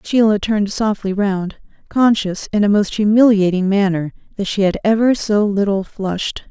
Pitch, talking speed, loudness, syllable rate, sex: 205 Hz, 155 wpm, -16 LUFS, 4.8 syllables/s, female